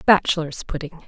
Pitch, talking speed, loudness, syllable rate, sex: 160 Hz, 165 wpm, -22 LUFS, 6.1 syllables/s, female